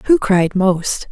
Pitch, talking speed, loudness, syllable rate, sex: 200 Hz, 160 wpm, -15 LUFS, 2.8 syllables/s, female